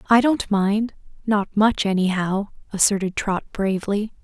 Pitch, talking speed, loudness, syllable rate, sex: 205 Hz, 130 wpm, -21 LUFS, 4.5 syllables/s, female